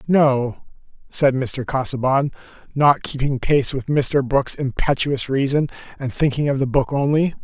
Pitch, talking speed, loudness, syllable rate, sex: 135 Hz, 145 wpm, -20 LUFS, 4.4 syllables/s, male